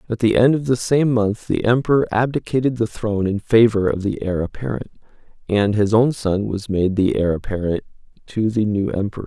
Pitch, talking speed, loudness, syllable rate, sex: 110 Hz, 200 wpm, -19 LUFS, 5.4 syllables/s, male